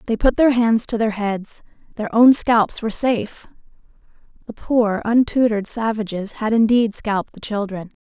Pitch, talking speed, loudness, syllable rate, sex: 220 Hz, 155 wpm, -19 LUFS, 4.9 syllables/s, female